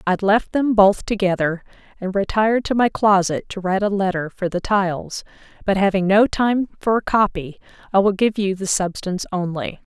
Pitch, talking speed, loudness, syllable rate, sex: 195 Hz, 185 wpm, -19 LUFS, 5.2 syllables/s, female